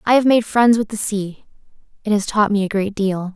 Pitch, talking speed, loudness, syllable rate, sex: 210 Hz, 250 wpm, -18 LUFS, 5.3 syllables/s, female